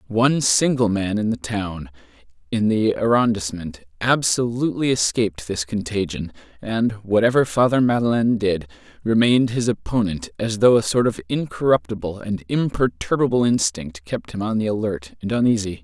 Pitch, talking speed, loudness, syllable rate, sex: 110 Hz, 140 wpm, -20 LUFS, 5.2 syllables/s, male